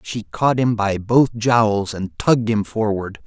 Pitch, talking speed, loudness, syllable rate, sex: 110 Hz, 185 wpm, -19 LUFS, 3.8 syllables/s, male